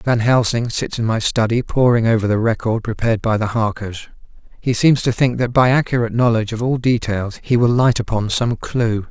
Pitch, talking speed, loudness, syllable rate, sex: 115 Hz, 205 wpm, -17 LUFS, 5.4 syllables/s, male